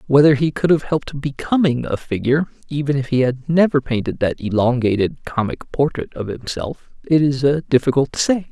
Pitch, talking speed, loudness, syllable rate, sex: 135 Hz, 175 wpm, -19 LUFS, 5.3 syllables/s, male